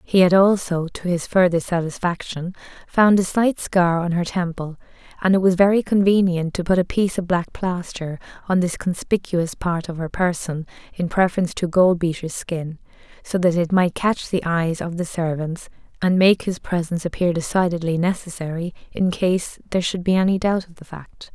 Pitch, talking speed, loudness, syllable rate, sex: 175 Hz, 185 wpm, -21 LUFS, 5.1 syllables/s, female